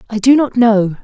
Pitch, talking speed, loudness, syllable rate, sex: 230 Hz, 235 wpm, -12 LUFS, 5.0 syllables/s, female